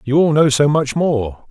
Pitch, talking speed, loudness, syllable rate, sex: 145 Hz, 240 wpm, -15 LUFS, 4.6 syllables/s, male